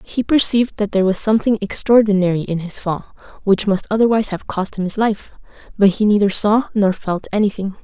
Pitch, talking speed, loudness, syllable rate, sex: 205 Hz, 190 wpm, -17 LUFS, 6.0 syllables/s, female